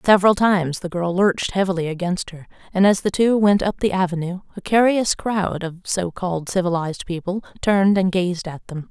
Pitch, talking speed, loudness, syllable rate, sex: 185 Hz, 190 wpm, -20 LUFS, 5.5 syllables/s, female